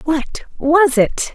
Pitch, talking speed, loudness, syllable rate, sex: 305 Hz, 135 wpm, -16 LUFS, 3.5 syllables/s, female